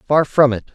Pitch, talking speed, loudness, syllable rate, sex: 135 Hz, 240 wpm, -16 LUFS, 4.4 syllables/s, male